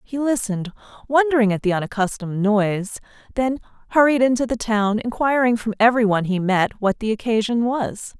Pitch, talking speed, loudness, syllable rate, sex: 225 Hz, 160 wpm, -20 LUFS, 5.9 syllables/s, female